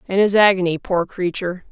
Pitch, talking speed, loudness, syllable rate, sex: 185 Hz, 175 wpm, -18 LUFS, 5.8 syllables/s, female